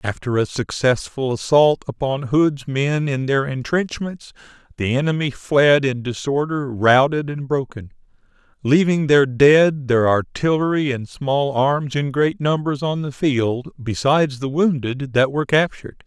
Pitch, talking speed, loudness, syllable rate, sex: 140 Hz, 140 wpm, -19 LUFS, 4.2 syllables/s, male